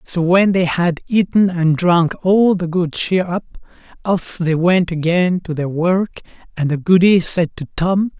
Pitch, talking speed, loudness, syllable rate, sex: 175 Hz, 185 wpm, -16 LUFS, 4.1 syllables/s, male